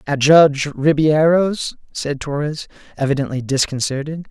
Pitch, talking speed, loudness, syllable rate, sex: 145 Hz, 100 wpm, -17 LUFS, 4.6 syllables/s, male